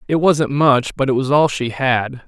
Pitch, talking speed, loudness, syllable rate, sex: 135 Hz, 240 wpm, -16 LUFS, 4.5 syllables/s, male